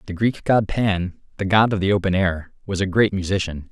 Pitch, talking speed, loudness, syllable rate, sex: 95 Hz, 225 wpm, -21 LUFS, 5.3 syllables/s, male